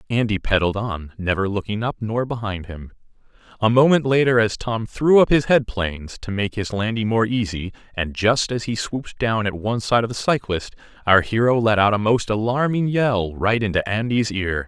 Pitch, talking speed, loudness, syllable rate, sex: 110 Hz, 195 wpm, -20 LUFS, 5.2 syllables/s, male